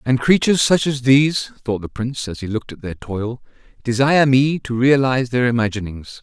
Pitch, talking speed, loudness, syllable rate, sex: 125 Hz, 195 wpm, -18 LUFS, 5.8 syllables/s, male